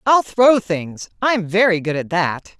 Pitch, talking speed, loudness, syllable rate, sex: 195 Hz, 185 wpm, -17 LUFS, 4.0 syllables/s, female